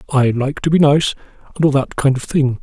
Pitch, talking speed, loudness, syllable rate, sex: 140 Hz, 250 wpm, -16 LUFS, 5.4 syllables/s, male